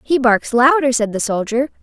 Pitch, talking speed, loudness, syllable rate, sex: 250 Hz, 195 wpm, -16 LUFS, 4.9 syllables/s, female